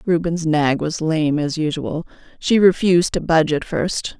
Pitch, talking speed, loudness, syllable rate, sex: 160 Hz, 170 wpm, -18 LUFS, 4.6 syllables/s, female